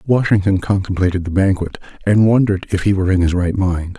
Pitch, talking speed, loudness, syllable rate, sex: 95 Hz, 195 wpm, -16 LUFS, 6.1 syllables/s, male